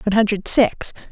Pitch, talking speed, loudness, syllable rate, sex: 210 Hz, 160 wpm, -17 LUFS, 6.0 syllables/s, female